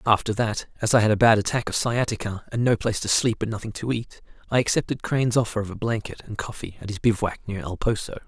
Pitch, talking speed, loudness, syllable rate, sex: 110 Hz, 245 wpm, -24 LUFS, 6.4 syllables/s, male